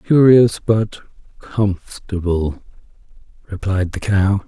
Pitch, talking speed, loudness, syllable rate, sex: 100 Hz, 80 wpm, -17 LUFS, 3.4 syllables/s, male